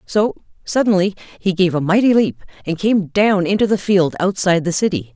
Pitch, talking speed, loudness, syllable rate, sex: 190 Hz, 185 wpm, -17 LUFS, 5.2 syllables/s, female